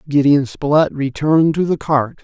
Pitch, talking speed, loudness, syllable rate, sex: 145 Hz, 160 wpm, -16 LUFS, 5.0 syllables/s, male